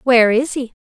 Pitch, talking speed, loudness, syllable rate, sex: 245 Hz, 215 wpm, -15 LUFS, 6.1 syllables/s, female